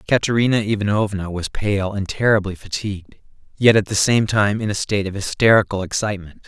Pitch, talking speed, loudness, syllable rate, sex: 100 Hz, 165 wpm, -19 LUFS, 5.9 syllables/s, male